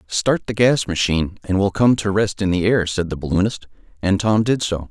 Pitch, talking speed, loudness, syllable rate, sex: 100 Hz, 230 wpm, -19 LUFS, 5.2 syllables/s, male